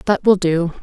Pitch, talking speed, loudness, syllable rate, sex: 185 Hz, 220 wpm, -16 LUFS, 4.9 syllables/s, female